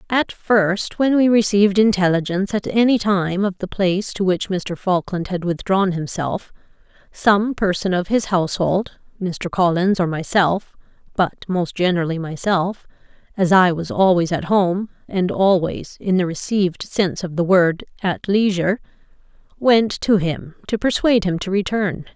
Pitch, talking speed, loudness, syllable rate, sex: 190 Hz, 155 wpm, -19 LUFS, 4.7 syllables/s, female